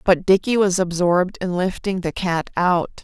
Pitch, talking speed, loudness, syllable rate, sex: 180 Hz, 180 wpm, -20 LUFS, 4.6 syllables/s, female